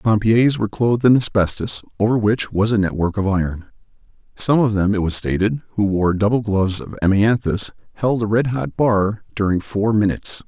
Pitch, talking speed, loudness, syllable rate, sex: 105 Hz, 190 wpm, -18 LUFS, 5.5 syllables/s, male